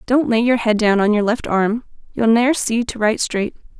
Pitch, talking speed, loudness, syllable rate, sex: 225 Hz, 235 wpm, -17 LUFS, 5.4 syllables/s, female